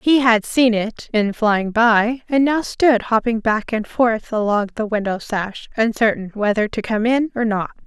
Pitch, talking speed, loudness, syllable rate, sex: 225 Hz, 190 wpm, -18 LUFS, 4.3 syllables/s, female